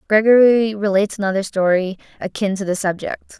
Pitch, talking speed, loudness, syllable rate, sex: 200 Hz, 140 wpm, -17 LUFS, 5.7 syllables/s, female